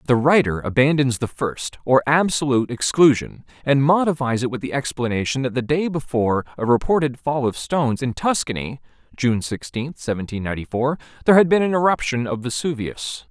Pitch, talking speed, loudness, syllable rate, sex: 135 Hz, 165 wpm, -20 LUFS, 5.5 syllables/s, male